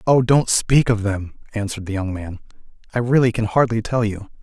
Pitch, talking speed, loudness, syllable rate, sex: 110 Hz, 205 wpm, -19 LUFS, 5.5 syllables/s, male